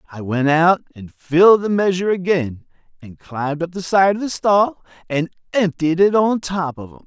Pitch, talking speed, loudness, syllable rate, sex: 170 Hz, 195 wpm, -18 LUFS, 5.0 syllables/s, male